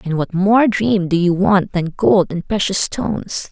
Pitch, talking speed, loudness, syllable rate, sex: 190 Hz, 205 wpm, -16 LUFS, 4.1 syllables/s, female